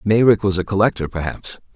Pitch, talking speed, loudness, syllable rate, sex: 95 Hz, 170 wpm, -18 LUFS, 5.8 syllables/s, male